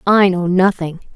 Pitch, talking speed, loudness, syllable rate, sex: 185 Hz, 155 wpm, -14 LUFS, 4.4 syllables/s, female